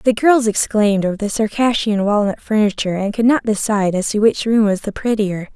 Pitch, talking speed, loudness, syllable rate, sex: 215 Hz, 205 wpm, -17 LUFS, 5.8 syllables/s, female